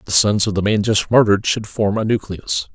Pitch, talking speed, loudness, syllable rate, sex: 105 Hz, 240 wpm, -17 LUFS, 5.5 syllables/s, male